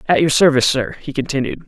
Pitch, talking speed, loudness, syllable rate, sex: 145 Hz, 215 wpm, -16 LUFS, 6.8 syllables/s, male